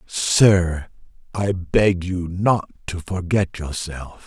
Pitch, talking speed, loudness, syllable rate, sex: 90 Hz, 110 wpm, -20 LUFS, 2.8 syllables/s, male